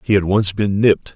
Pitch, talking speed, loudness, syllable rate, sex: 100 Hz, 260 wpm, -16 LUFS, 5.7 syllables/s, male